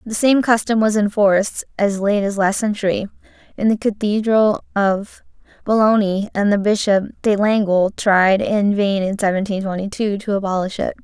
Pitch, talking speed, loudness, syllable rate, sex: 205 Hz, 170 wpm, -18 LUFS, 4.9 syllables/s, female